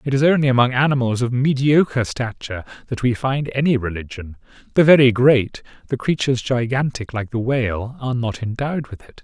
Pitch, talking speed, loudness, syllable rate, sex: 125 Hz, 175 wpm, -19 LUFS, 5.7 syllables/s, male